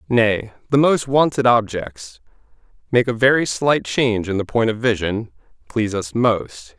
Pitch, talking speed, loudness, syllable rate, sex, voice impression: 110 Hz, 160 wpm, -19 LUFS, 2.6 syllables/s, male, very masculine, very adult-like, slightly tensed, powerful, bright, slightly soft, clear, fluent, very cool, intellectual, very refreshing, very sincere, calm, slightly mature, very friendly, very reassuring, unique, very elegant, wild, sweet, very lively, kind, slightly intense